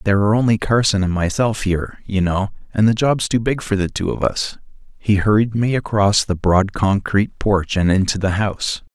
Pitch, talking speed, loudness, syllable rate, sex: 100 Hz, 210 wpm, -18 LUFS, 5.3 syllables/s, male